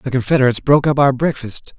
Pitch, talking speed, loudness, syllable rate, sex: 135 Hz, 200 wpm, -15 LUFS, 7.2 syllables/s, male